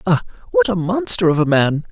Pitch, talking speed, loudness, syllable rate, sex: 160 Hz, 220 wpm, -17 LUFS, 5.5 syllables/s, male